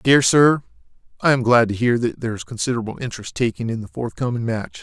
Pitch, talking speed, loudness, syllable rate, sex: 120 Hz, 210 wpm, -20 LUFS, 6.4 syllables/s, male